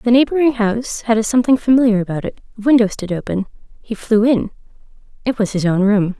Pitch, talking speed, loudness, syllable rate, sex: 225 Hz, 205 wpm, -16 LUFS, 6.5 syllables/s, female